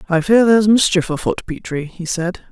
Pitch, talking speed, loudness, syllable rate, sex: 185 Hz, 190 wpm, -16 LUFS, 5.4 syllables/s, female